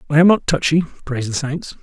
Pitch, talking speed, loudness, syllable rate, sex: 150 Hz, 230 wpm, -18 LUFS, 6.4 syllables/s, male